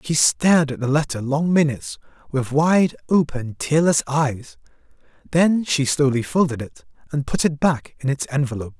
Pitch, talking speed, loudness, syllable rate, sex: 145 Hz, 165 wpm, -20 LUFS, 4.9 syllables/s, male